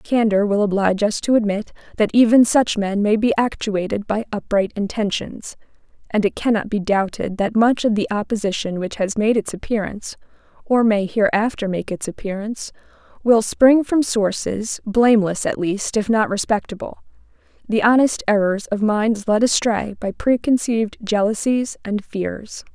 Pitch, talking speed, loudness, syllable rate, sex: 215 Hz, 155 wpm, -19 LUFS, 4.8 syllables/s, female